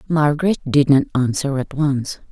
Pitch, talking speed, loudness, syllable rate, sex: 140 Hz, 155 wpm, -18 LUFS, 4.9 syllables/s, female